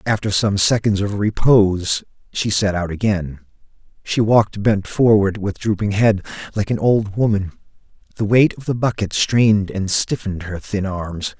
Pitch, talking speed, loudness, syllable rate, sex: 105 Hz, 165 wpm, -18 LUFS, 4.6 syllables/s, male